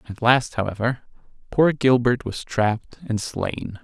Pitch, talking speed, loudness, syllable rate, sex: 120 Hz, 140 wpm, -22 LUFS, 4.2 syllables/s, male